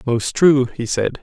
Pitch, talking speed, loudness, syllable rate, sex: 130 Hz, 195 wpm, -17 LUFS, 3.6 syllables/s, male